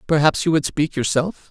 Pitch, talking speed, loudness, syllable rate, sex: 155 Hz, 200 wpm, -19 LUFS, 5.2 syllables/s, male